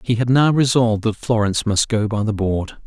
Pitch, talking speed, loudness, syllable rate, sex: 110 Hz, 230 wpm, -18 LUFS, 5.6 syllables/s, male